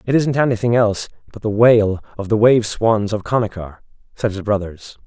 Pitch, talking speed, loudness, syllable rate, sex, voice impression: 110 Hz, 190 wpm, -17 LUFS, 5.3 syllables/s, male, masculine, adult-like, slightly fluent, slightly refreshing, sincere